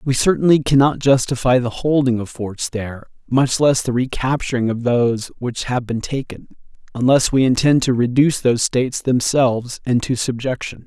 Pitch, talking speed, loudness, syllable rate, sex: 125 Hz, 165 wpm, -18 LUFS, 5.2 syllables/s, male